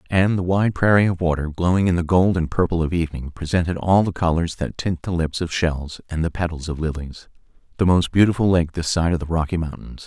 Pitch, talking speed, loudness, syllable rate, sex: 85 Hz, 225 wpm, -21 LUFS, 5.9 syllables/s, male